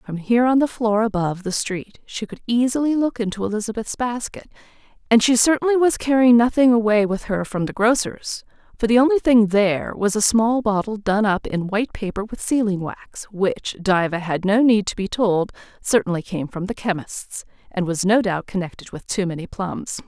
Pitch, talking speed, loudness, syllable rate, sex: 215 Hz, 195 wpm, -20 LUFS, 5.2 syllables/s, female